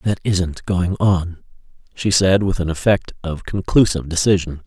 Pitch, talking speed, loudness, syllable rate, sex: 90 Hz, 155 wpm, -18 LUFS, 4.6 syllables/s, male